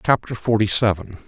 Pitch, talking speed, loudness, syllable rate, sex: 110 Hz, 140 wpm, -20 LUFS, 5.7 syllables/s, male